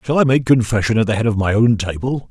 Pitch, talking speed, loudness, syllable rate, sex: 115 Hz, 285 wpm, -16 LUFS, 6.5 syllables/s, male